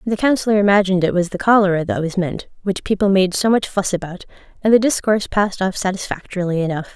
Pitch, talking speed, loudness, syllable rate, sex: 195 Hz, 205 wpm, -18 LUFS, 6.7 syllables/s, female